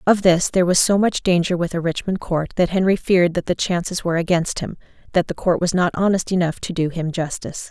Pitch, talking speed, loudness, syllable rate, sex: 175 Hz, 240 wpm, -19 LUFS, 6.1 syllables/s, female